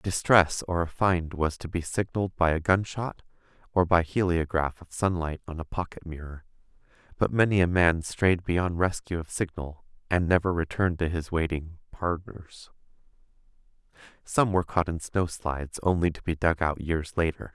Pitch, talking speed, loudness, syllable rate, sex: 85 Hz, 165 wpm, -27 LUFS, 4.9 syllables/s, male